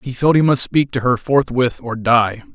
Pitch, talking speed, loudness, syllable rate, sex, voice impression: 125 Hz, 235 wpm, -16 LUFS, 4.7 syllables/s, male, very masculine, very adult-like, very thick, tensed, very powerful, bright, slightly hard, very clear, very fluent, cool, intellectual, very refreshing, sincere, calm, friendly, reassuring, unique, elegant, slightly wild, sweet, kind, slightly intense